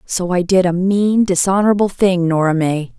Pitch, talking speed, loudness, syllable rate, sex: 185 Hz, 180 wpm, -15 LUFS, 4.9 syllables/s, female